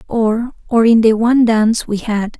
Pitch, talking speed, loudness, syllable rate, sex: 225 Hz, 175 wpm, -14 LUFS, 4.8 syllables/s, female